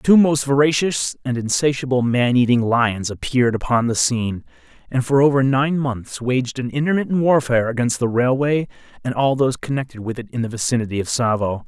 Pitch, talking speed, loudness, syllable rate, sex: 125 Hz, 180 wpm, -19 LUFS, 5.6 syllables/s, male